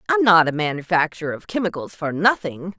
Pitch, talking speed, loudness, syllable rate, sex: 170 Hz, 170 wpm, -20 LUFS, 5.9 syllables/s, female